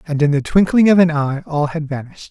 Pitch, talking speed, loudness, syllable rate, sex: 155 Hz, 260 wpm, -16 LUFS, 6.1 syllables/s, male